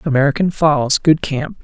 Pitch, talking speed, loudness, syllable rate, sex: 150 Hz, 110 wpm, -15 LUFS, 4.7 syllables/s, female